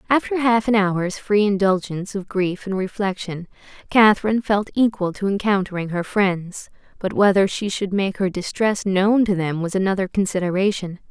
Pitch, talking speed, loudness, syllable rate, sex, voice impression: 195 Hz, 160 wpm, -20 LUFS, 5.1 syllables/s, female, very feminine, slightly adult-like, slightly thin, slightly relaxed, slightly powerful, slightly bright, soft, clear, fluent, very cute, slightly cool, very intellectual, refreshing, sincere, very calm, very friendly, very reassuring, unique, very elegant, slightly wild, very sweet, lively, very kind, slightly modest, slightly light